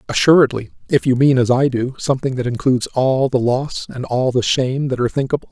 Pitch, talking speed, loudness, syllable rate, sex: 130 Hz, 205 wpm, -17 LUFS, 6.1 syllables/s, male